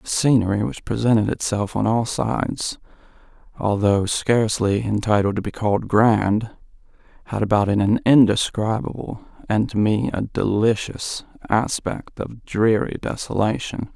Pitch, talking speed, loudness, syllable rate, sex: 110 Hz, 125 wpm, -21 LUFS, 4.5 syllables/s, male